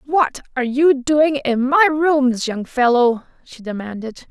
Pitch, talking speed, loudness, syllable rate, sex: 265 Hz, 155 wpm, -17 LUFS, 4.0 syllables/s, female